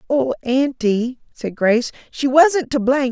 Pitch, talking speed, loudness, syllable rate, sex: 255 Hz, 155 wpm, -18 LUFS, 4.3 syllables/s, female